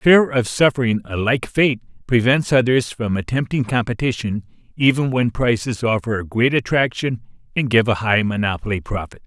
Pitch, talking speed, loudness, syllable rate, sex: 120 Hz, 155 wpm, -19 LUFS, 5.1 syllables/s, male